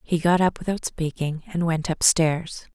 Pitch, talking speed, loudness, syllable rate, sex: 165 Hz, 195 wpm, -23 LUFS, 4.4 syllables/s, female